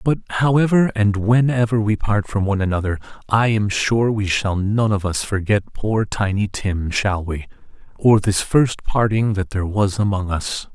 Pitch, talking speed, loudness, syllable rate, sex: 105 Hz, 170 wpm, -19 LUFS, 4.6 syllables/s, male